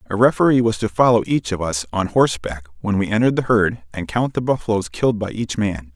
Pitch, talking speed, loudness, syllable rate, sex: 105 Hz, 230 wpm, -19 LUFS, 6.0 syllables/s, male